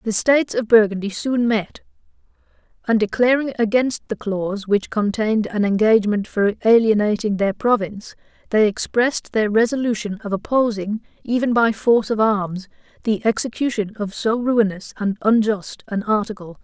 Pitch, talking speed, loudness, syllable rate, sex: 215 Hz, 140 wpm, -19 LUFS, 5.1 syllables/s, female